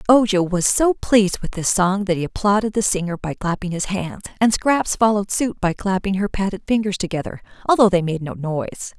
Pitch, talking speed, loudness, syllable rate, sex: 195 Hz, 205 wpm, -20 LUFS, 5.5 syllables/s, female